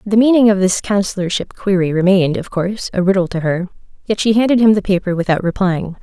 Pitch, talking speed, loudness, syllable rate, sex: 190 Hz, 210 wpm, -15 LUFS, 6.2 syllables/s, female